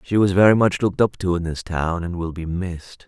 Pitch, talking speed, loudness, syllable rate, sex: 90 Hz, 275 wpm, -20 LUFS, 5.7 syllables/s, male